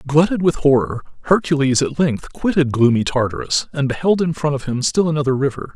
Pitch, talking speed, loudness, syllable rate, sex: 145 Hz, 190 wpm, -18 LUFS, 5.7 syllables/s, male